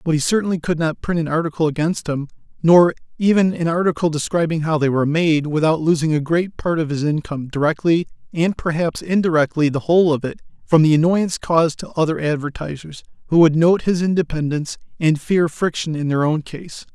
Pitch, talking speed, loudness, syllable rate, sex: 160 Hz, 190 wpm, -18 LUFS, 5.8 syllables/s, male